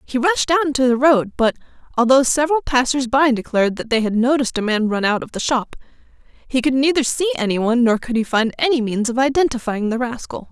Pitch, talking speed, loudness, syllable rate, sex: 255 Hz, 215 wpm, -18 LUFS, 6.1 syllables/s, female